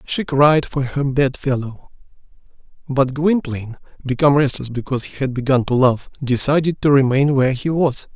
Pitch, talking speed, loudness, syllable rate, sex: 135 Hz, 160 wpm, -18 LUFS, 5.3 syllables/s, male